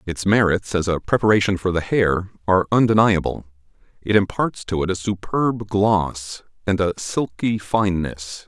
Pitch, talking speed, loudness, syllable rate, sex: 95 Hz, 140 wpm, -20 LUFS, 4.7 syllables/s, male